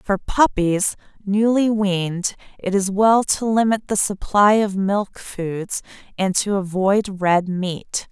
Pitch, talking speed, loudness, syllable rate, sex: 200 Hz, 140 wpm, -20 LUFS, 3.5 syllables/s, female